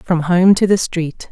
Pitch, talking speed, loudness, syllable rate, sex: 175 Hz, 230 wpm, -14 LUFS, 3.9 syllables/s, female